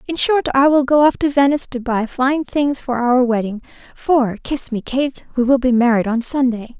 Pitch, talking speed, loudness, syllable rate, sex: 260 Hz, 205 wpm, -17 LUFS, 4.9 syllables/s, female